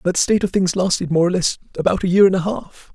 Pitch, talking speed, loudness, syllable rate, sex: 180 Hz, 285 wpm, -18 LUFS, 6.4 syllables/s, male